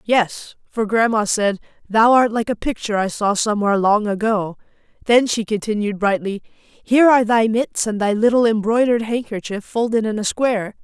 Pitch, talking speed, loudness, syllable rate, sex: 220 Hz, 170 wpm, -18 LUFS, 5.2 syllables/s, female